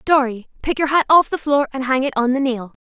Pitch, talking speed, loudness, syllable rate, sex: 270 Hz, 275 wpm, -18 LUFS, 5.8 syllables/s, female